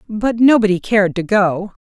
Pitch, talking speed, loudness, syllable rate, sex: 205 Hz, 165 wpm, -15 LUFS, 5.0 syllables/s, female